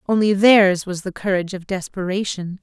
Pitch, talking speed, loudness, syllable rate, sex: 190 Hz, 160 wpm, -19 LUFS, 5.2 syllables/s, female